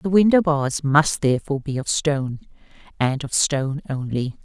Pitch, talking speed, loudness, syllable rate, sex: 145 Hz, 160 wpm, -21 LUFS, 5.1 syllables/s, female